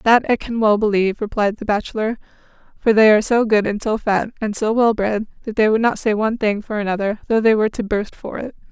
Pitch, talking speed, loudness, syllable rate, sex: 215 Hz, 250 wpm, -18 LUFS, 6.1 syllables/s, female